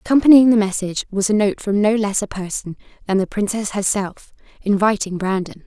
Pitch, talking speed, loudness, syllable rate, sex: 205 Hz, 180 wpm, -18 LUFS, 5.8 syllables/s, female